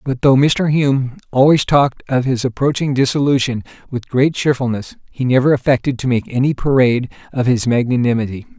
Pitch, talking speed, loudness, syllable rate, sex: 130 Hz, 160 wpm, -16 LUFS, 5.6 syllables/s, male